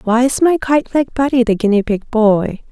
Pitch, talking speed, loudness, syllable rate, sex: 240 Hz, 220 wpm, -14 LUFS, 4.8 syllables/s, female